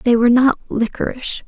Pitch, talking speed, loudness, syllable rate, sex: 240 Hz, 165 wpm, -17 LUFS, 6.0 syllables/s, female